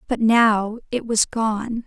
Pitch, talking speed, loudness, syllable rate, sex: 225 Hz, 160 wpm, -20 LUFS, 3.2 syllables/s, female